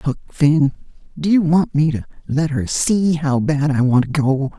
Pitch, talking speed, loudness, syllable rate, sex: 145 Hz, 210 wpm, -17 LUFS, 4.2 syllables/s, male